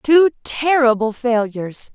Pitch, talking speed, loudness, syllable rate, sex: 250 Hz, 90 wpm, -17 LUFS, 3.9 syllables/s, female